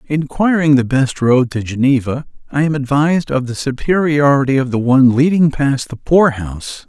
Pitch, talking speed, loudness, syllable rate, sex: 140 Hz, 175 wpm, -14 LUFS, 5.1 syllables/s, male